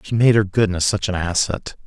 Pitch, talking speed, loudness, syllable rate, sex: 100 Hz, 225 wpm, -19 LUFS, 5.2 syllables/s, male